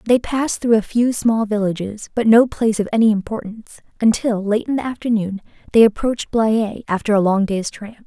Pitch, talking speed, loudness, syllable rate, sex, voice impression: 220 Hz, 195 wpm, -18 LUFS, 5.6 syllables/s, female, feminine, young, relaxed, weak, raspy, slightly cute, intellectual, calm, elegant, slightly sweet, kind, modest